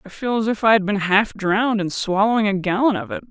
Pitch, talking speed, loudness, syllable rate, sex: 210 Hz, 270 wpm, -19 LUFS, 6.0 syllables/s, female